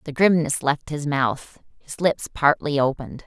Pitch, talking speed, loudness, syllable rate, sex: 150 Hz, 165 wpm, -22 LUFS, 4.4 syllables/s, female